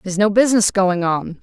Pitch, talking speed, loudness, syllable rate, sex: 195 Hz, 210 wpm, -16 LUFS, 6.0 syllables/s, female